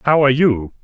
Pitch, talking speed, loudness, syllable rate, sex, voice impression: 135 Hz, 215 wpm, -15 LUFS, 6.4 syllables/s, male, very masculine, adult-like, slightly middle-aged, very thick, tensed, powerful, bright, slightly hard, slightly muffled, fluent, cool, very intellectual, slightly refreshing, sincere, very calm, very mature, friendly, reassuring, very unique, elegant, wild, sweet, slightly lively, kind, intense